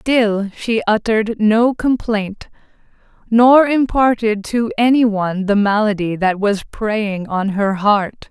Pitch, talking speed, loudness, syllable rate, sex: 215 Hz, 130 wpm, -16 LUFS, 3.8 syllables/s, female